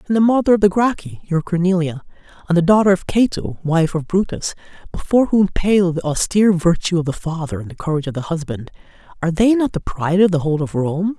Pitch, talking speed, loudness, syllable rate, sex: 175 Hz, 215 wpm, -18 LUFS, 6.3 syllables/s, female